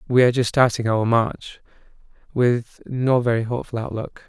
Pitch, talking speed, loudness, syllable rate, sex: 120 Hz, 155 wpm, -21 LUFS, 5.2 syllables/s, male